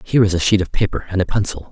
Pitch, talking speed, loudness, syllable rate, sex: 95 Hz, 315 wpm, -18 LUFS, 7.6 syllables/s, male